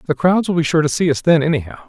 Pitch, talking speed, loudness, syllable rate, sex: 155 Hz, 320 wpm, -16 LUFS, 7.2 syllables/s, male